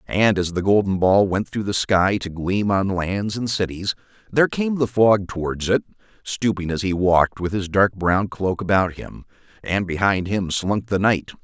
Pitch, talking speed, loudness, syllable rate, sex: 100 Hz, 200 wpm, -20 LUFS, 4.6 syllables/s, male